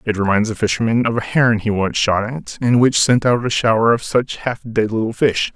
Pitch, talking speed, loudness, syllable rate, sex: 115 Hz, 250 wpm, -17 LUFS, 5.4 syllables/s, male